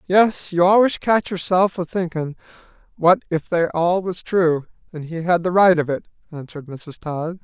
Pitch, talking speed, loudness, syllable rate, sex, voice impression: 175 Hz, 185 wpm, -19 LUFS, 4.2 syllables/s, male, masculine, adult-like, very middle-aged, slightly thick, slightly relaxed, slightly weak, slightly dark, slightly clear, slightly halting, sincere, slightly calm, slightly friendly, reassuring, slightly unique, elegant, slightly wild, slightly sweet, slightly lively